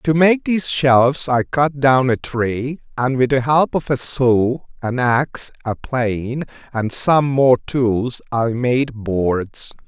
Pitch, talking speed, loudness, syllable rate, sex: 130 Hz, 165 wpm, -18 LUFS, 3.5 syllables/s, male